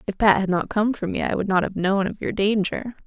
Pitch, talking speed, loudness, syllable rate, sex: 200 Hz, 295 wpm, -22 LUFS, 5.6 syllables/s, female